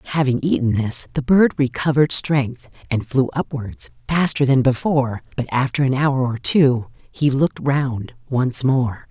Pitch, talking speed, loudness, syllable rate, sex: 130 Hz, 160 wpm, -19 LUFS, 4.3 syllables/s, female